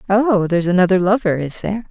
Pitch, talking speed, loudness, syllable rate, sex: 190 Hz, 190 wpm, -16 LUFS, 6.4 syllables/s, female